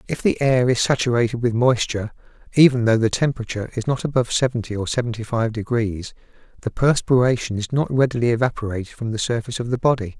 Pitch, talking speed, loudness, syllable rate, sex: 120 Hz, 180 wpm, -20 LUFS, 6.6 syllables/s, male